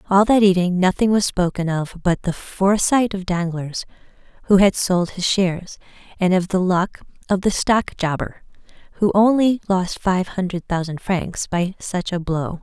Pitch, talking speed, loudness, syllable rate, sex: 185 Hz, 170 wpm, -19 LUFS, 4.6 syllables/s, female